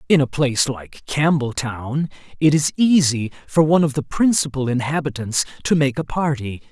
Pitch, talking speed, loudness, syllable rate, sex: 140 Hz, 160 wpm, -19 LUFS, 5.0 syllables/s, male